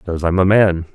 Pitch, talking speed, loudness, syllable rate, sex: 90 Hz, 255 wpm, -15 LUFS, 5.3 syllables/s, male